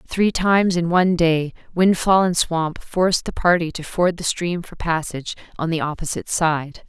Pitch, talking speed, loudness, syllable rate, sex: 170 Hz, 185 wpm, -20 LUFS, 5.0 syllables/s, female